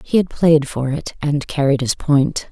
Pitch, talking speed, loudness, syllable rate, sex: 145 Hz, 215 wpm, -18 LUFS, 4.2 syllables/s, female